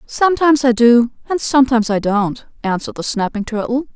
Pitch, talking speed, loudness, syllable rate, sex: 240 Hz, 165 wpm, -16 LUFS, 6.2 syllables/s, female